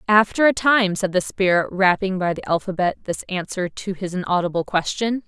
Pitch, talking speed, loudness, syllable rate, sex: 190 Hz, 180 wpm, -20 LUFS, 5.2 syllables/s, female